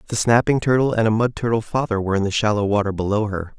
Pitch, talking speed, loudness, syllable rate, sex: 110 Hz, 250 wpm, -20 LUFS, 6.8 syllables/s, male